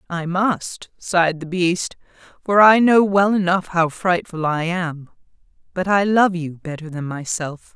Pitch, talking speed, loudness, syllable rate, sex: 175 Hz, 160 wpm, -19 LUFS, 4.1 syllables/s, female